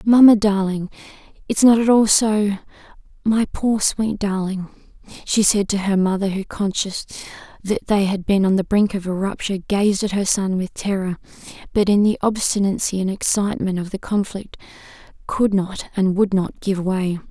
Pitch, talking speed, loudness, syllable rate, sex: 200 Hz, 175 wpm, -19 LUFS, 4.9 syllables/s, female